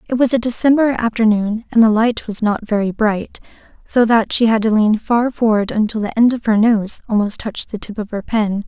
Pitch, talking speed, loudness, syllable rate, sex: 220 Hz, 230 wpm, -16 LUFS, 5.3 syllables/s, female